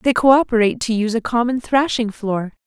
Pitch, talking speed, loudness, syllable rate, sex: 230 Hz, 180 wpm, -18 LUFS, 6.0 syllables/s, female